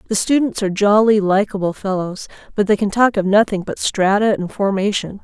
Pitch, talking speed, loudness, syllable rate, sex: 205 Hz, 185 wpm, -17 LUFS, 5.5 syllables/s, female